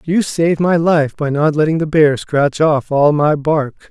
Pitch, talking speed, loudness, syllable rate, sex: 155 Hz, 215 wpm, -14 LUFS, 4.2 syllables/s, male